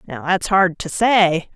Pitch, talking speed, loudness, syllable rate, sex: 180 Hz, 195 wpm, -17 LUFS, 3.7 syllables/s, female